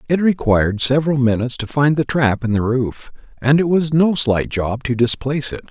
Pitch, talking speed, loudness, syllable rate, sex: 135 Hz, 210 wpm, -17 LUFS, 5.4 syllables/s, male